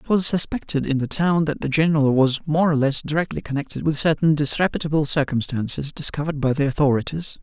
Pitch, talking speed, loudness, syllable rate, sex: 145 Hz, 185 wpm, -21 LUFS, 6.2 syllables/s, male